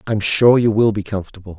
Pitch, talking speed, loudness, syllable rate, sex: 105 Hz, 225 wpm, -16 LUFS, 6.2 syllables/s, male